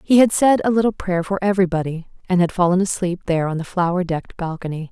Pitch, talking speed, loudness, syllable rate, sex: 180 Hz, 220 wpm, -19 LUFS, 6.7 syllables/s, female